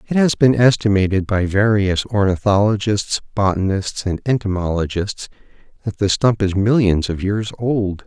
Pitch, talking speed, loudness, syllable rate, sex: 105 Hz, 135 wpm, -18 LUFS, 4.7 syllables/s, male